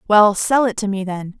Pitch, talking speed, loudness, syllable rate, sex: 205 Hz, 255 wpm, -17 LUFS, 5.0 syllables/s, female